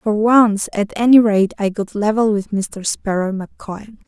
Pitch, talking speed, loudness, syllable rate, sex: 210 Hz, 175 wpm, -16 LUFS, 4.6 syllables/s, female